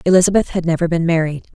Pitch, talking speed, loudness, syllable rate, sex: 170 Hz, 190 wpm, -16 LUFS, 6.9 syllables/s, female